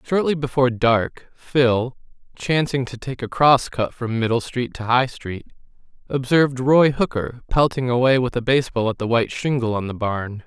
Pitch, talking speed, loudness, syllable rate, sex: 125 Hz, 180 wpm, -20 LUFS, 4.9 syllables/s, male